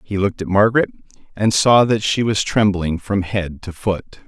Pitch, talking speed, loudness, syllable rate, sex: 100 Hz, 195 wpm, -18 LUFS, 4.9 syllables/s, male